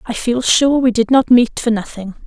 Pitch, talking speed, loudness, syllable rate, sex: 235 Hz, 240 wpm, -14 LUFS, 4.9 syllables/s, female